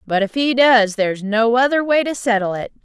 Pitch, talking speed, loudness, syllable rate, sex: 235 Hz, 230 wpm, -16 LUFS, 5.3 syllables/s, female